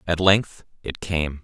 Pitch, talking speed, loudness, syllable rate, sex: 85 Hz, 165 wpm, -21 LUFS, 3.6 syllables/s, male